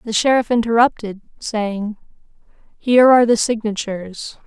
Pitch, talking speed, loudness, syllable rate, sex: 225 Hz, 95 wpm, -16 LUFS, 5.1 syllables/s, female